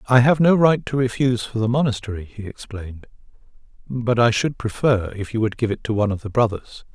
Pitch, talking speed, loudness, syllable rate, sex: 115 Hz, 215 wpm, -20 LUFS, 6.0 syllables/s, male